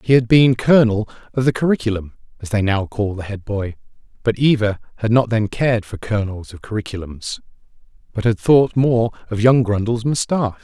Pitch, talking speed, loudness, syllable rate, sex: 110 Hz, 180 wpm, -18 LUFS, 5.7 syllables/s, male